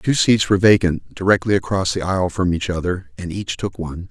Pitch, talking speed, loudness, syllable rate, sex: 95 Hz, 220 wpm, -19 LUFS, 5.7 syllables/s, male